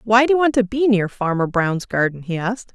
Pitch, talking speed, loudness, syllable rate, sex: 210 Hz, 260 wpm, -19 LUFS, 5.7 syllables/s, female